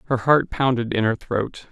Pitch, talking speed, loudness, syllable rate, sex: 120 Hz, 210 wpm, -21 LUFS, 4.7 syllables/s, male